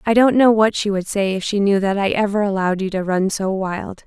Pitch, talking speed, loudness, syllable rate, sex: 200 Hz, 280 wpm, -18 LUFS, 5.6 syllables/s, female